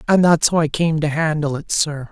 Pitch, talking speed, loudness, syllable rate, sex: 155 Hz, 255 wpm, -18 LUFS, 5.1 syllables/s, male